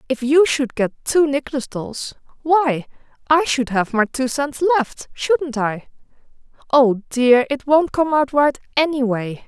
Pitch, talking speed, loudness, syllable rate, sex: 270 Hz, 160 wpm, -18 LUFS, 4.0 syllables/s, female